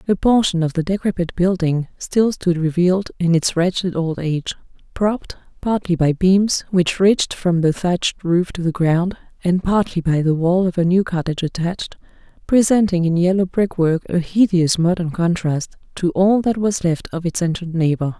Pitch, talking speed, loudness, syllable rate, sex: 175 Hz, 180 wpm, -18 LUFS, 4.9 syllables/s, female